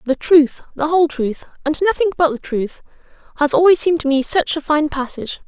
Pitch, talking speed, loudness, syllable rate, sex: 300 Hz, 210 wpm, -17 LUFS, 5.8 syllables/s, female